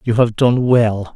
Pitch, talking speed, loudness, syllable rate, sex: 115 Hz, 210 wpm, -15 LUFS, 3.8 syllables/s, male